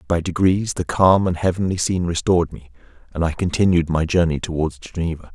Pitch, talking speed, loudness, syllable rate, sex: 85 Hz, 180 wpm, -20 LUFS, 5.9 syllables/s, male